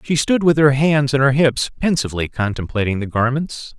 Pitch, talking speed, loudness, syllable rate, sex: 135 Hz, 190 wpm, -17 LUFS, 5.3 syllables/s, male